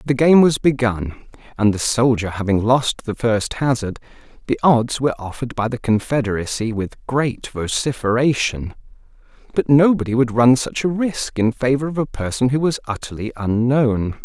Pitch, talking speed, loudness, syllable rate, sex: 120 Hz, 160 wpm, -19 LUFS, 4.9 syllables/s, male